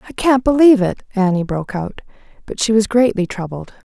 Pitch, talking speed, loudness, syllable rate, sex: 210 Hz, 180 wpm, -16 LUFS, 5.7 syllables/s, female